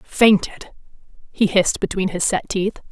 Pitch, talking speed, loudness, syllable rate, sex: 190 Hz, 145 wpm, -19 LUFS, 4.5 syllables/s, female